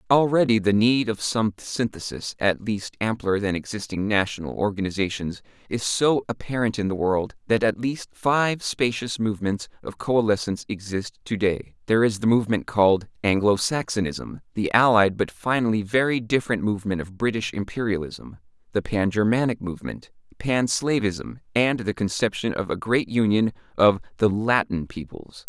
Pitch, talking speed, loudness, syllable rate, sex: 105 Hz, 150 wpm, -23 LUFS, 5.1 syllables/s, male